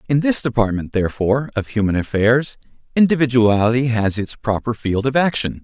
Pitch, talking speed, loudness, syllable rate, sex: 120 Hz, 150 wpm, -18 LUFS, 5.6 syllables/s, male